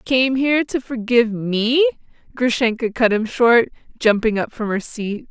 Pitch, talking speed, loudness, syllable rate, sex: 240 Hz, 160 wpm, -18 LUFS, 4.6 syllables/s, female